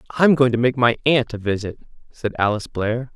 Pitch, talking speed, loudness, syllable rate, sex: 120 Hz, 210 wpm, -19 LUFS, 5.5 syllables/s, male